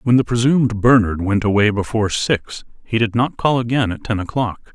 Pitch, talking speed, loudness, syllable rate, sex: 115 Hz, 200 wpm, -17 LUFS, 5.5 syllables/s, male